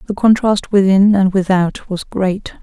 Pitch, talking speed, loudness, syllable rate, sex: 195 Hz, 160 wpm, -14 LUFS, 4.2 syllables/s, female